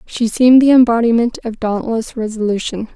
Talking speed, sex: 140 wpm, female